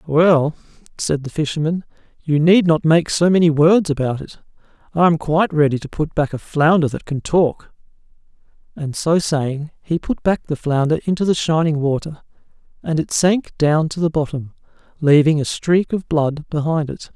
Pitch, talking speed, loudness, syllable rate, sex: 155 Hz, 180 wpm, -18 LUFS, 4.8 syllables/s, male